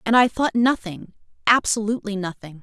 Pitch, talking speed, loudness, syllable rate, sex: 215 Hz, 135 wpm, -21 LUFS, 5.4 syllables/s, female